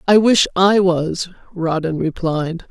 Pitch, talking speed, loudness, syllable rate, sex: 175 Hz, 135 wpm, -17 LUFS, 3.7 syllables/s, female